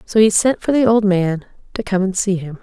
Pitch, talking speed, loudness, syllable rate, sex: 200 Hz, 275 wpm, -16 LUFS, 5.3 syllables/s, female